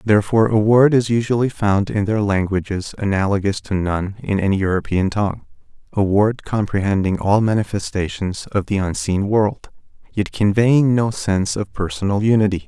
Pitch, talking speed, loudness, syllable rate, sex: 100 Hz, 150 wpm, -18 LUFS, 5.2 syllables/s, male